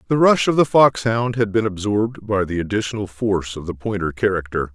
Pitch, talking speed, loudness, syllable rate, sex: 105 Hz, 200 wpm, -19 LUFS, 5.8 syllables/s, male